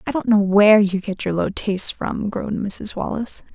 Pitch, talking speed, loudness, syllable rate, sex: 205 Hz, 220 wpm, -19 LUFS, 5.4 syllables/s, female